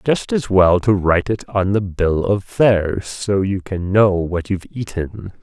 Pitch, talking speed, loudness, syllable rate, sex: 95 Hz, 200 wpm, -18 LUFS, 4.0 syllables/s, male